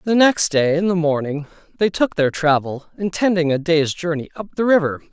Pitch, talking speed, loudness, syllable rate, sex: 170 Hz, 200 wpm, -18 LUFS, 5.2 syllables/s, male